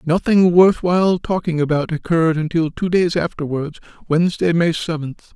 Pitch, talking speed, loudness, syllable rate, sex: 165 Hz, 135 wpm, -17 LUFS, 5.1 syllables/s, male